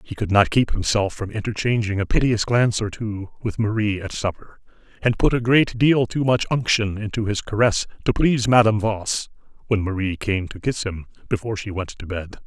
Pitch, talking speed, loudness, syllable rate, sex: 105 Hz, 200 wpm, -21 LUFS, 5.5 syllables/s, male